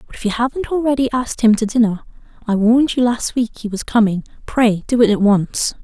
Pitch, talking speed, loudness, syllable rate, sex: 230 Hz, 205 wpm, -17 LUFS, 6.0 syllables/s, female